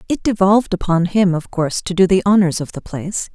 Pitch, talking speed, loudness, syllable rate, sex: 185 Hz, 235 wpm, -17 LUFS, 6.2 syllables/s, female